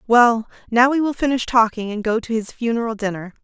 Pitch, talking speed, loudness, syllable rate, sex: 230 Hz, 210 wpm, -19 LUFS, 5.7 syllables/s, female